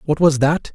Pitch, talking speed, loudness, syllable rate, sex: 150 Hz, 245 wpm, -17 LUFS, 4.9 syllables/s, male